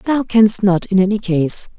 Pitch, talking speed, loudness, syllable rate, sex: 200 Hz, 200 wpm, -15 LUFS, 4.4 syllables/s, female